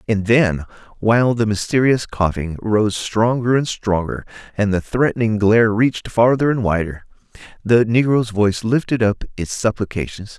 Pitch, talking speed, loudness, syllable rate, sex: 110 Hz, 145 wpm, -18 LUFS, 4.9 syllables/s, male